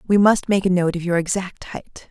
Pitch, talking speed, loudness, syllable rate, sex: 185 Hz, 255 wpm, -19 LUFS, 5.0 syllables/s, female